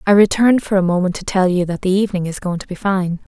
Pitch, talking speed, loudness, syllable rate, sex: 190 Hz, 285 wpm, -17 LUFS, 6.8 syllables/s, female